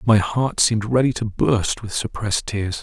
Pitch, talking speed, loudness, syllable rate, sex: 110 Hz, 190 wpm, -20 LUFS, 4.8 syllables/s, male